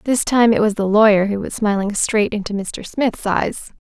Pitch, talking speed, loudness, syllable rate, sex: 210 Hz, 220 wpm, -17 LUFS, 4.7 syllables/s, female